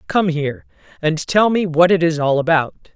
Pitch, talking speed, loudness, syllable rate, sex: 165 Hz, 205 wpm, -17 LUFS, 5.3 syllables/s, female